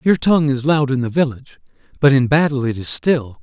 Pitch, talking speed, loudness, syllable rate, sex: 135 Hz, 230 wpm, -17 LUFS, 5.8 syllables/s, male